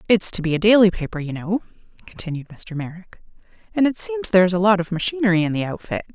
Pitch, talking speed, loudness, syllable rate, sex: 190 Hz, 215 wpm, -20 LUFS, 6.5 syllables/s, female